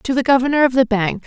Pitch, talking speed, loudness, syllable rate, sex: 245 Hz, 285 wpm, -16 LUFS, 6.5 syllables/s, female